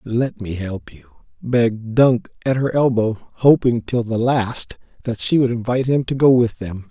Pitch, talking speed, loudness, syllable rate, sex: 115 Hz, 190 wpm, -18 LUFS, 4.5 syllables/s, male